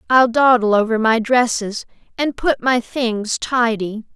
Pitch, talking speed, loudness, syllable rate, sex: 235 Hz, 145 wpm, -17 LUFS, 3.9 syllables/s, female